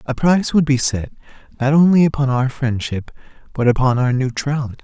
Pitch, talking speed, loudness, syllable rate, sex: 135 Hz, 175 wpm, -17 LUFS, 5.8 syllables/s, male